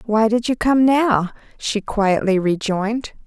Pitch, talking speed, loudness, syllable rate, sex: 220 Hz, 145 wpm, -18 LUFS, 4.0 syllables/s, female